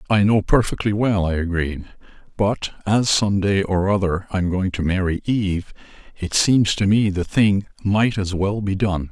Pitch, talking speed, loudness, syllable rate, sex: 95 Hz, 185 wpm, -20 LUFS, 4.5 syllables/s, male